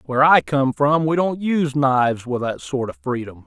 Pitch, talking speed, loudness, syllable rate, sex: 135 Hz, 225 wpm, -19 LUFS, 5.2 syllables/s, male